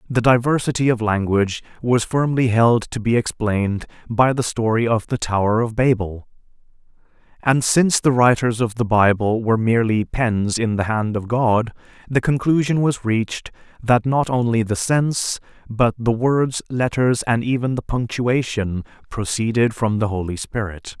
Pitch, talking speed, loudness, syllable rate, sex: 115 Hz, 155 wpm, -19 LUFS, 4.7 syllables/s, male